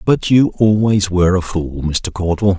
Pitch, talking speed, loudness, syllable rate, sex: 95 Hz, 185 wpm, -15 LUFS, 4.6 syllables/s, male